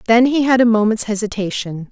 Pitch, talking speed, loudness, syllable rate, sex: 225 Hz, 190 wpm, -16 LUFS, 5.8 syllables/s, female